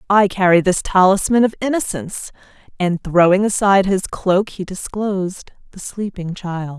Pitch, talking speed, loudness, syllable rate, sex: 190 Hz, 140 wpm, -17 LUFS, 4.8 syllables/s, female